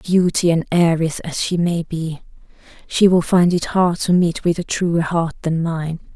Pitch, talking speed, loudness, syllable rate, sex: 170 Hz, 195 wpm, -18 LUFS, 4.3 syllables/s, female